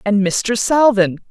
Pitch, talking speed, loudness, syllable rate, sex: 215 Hz, 140 wpm, -15 LUFS, 3.6 syllables/s, female